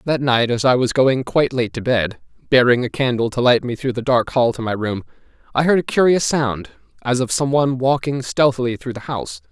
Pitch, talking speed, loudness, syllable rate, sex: 125 Hz, 235 wpm, -18 LUFS, 5.6 syllables/s, male